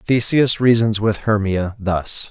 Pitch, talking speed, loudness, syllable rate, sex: 110 Hz, 130 wpm, -17 LUFS, 3.6 syllables/s, male